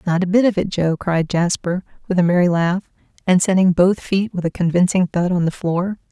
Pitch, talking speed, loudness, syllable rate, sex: 180 Hz, 225 wpm, -18 LUFS, 5.3 syllables/s, female